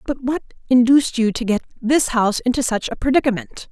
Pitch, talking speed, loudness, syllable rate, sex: 245 Hz, 195 wpm, -18 LUFS, 6.3 syllables/s, female